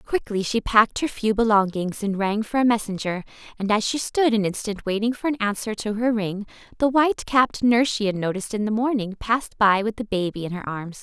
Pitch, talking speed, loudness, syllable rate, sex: 215 Hz, 230 wpm, -22 LUFS, 5.8 syllables/s, female